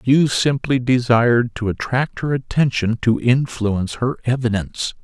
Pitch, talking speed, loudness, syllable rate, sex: 120 Hz, 130 wpm, -19 LUFS, 4.6 syllables/s, male